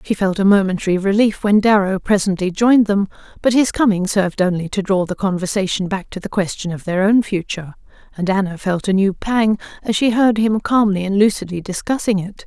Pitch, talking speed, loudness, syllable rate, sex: 200 Hz, 200 wpm, -17 LUFS, 5.7 syllables/s, female